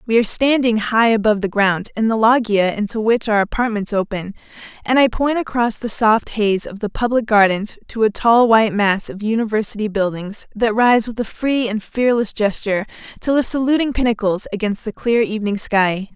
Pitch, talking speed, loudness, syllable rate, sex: 220 Hz, 190 wpm, -17 LUFS, 5.4 syllables/s, female